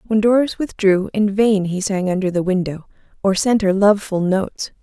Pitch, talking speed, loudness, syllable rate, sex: 200 Hz, 200 wpm, -18 LUFS, 5.0 syllables/s, female